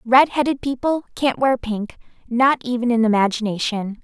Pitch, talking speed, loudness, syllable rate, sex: 240 Hz, 135 wpm, -19 LUFS, 4.9 syllables/s, female